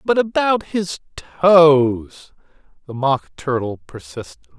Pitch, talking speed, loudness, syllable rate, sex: 150 Hz, 105 wpm, -17 LUFS, 3.3 syllables/s, male